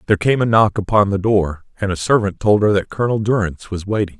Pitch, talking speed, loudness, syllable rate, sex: 100 Hz, 245 wpm, -17 LUFS, 6.5 syllables/s, male